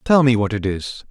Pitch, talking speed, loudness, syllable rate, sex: 115 Hz, 270 wpm, -19 LUFS, 5.1 syllables/s, male